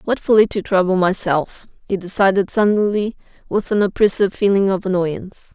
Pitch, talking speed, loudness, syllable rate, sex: 195 Hz, 150 wpm, -17 LUFS, 5.5 syllables/s, female